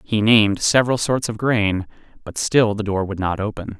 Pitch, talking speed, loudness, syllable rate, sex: 105 Hz, 205 wpm, -19 LUFS, 5.1 syllables/s, male